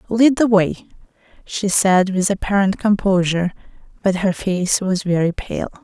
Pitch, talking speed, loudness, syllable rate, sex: 195 Hz, 145 wpm, -18 LUFS, 4.5 syllables/s, female